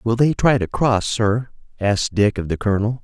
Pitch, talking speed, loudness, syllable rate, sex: 110 Hz, 215 wpm, -19 LUFS, 5.2 syllables/s, male